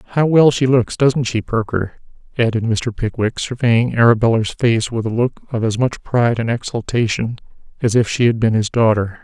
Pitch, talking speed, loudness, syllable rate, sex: 115 Hz, 190 wpm, -17 LUFS, 5.2 syllables/s, male